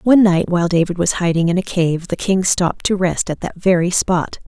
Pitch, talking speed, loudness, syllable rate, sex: 180 Hz, 235 wpm, -17 LUFS, 5.5 syllables/s, female